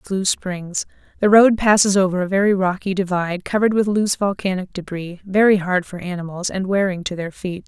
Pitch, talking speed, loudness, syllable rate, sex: 190 Hz, 180 wpm, -19 LUFS, 5.6 syllables/s, female